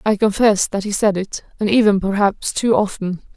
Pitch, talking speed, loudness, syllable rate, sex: 200 Hz, 195 wpm, -17 LUFS, 5.0 syllables/s, female